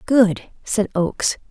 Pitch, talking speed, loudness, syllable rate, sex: 210 Hz, 120 wpm, -20 LUFS, 3.6 syllables/s, female